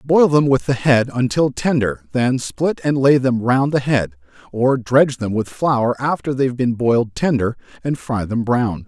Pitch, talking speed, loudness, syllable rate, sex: 125 Hz, 205 wpm, -18 LUFS, 4.5 syllables/s, male